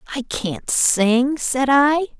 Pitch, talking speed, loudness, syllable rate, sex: 260 Hz, 135 wpm, -18 LUFS, 2.9 syllables/s, female